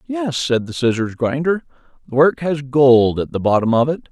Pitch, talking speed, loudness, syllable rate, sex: 140 Hz, 205 wpm, -17 LUFS, 5.0 syllables/s, male